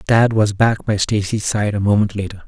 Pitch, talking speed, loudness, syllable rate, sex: 105 Hz, 220 wpm, -17 LUFS, 5.3 syllables/s, male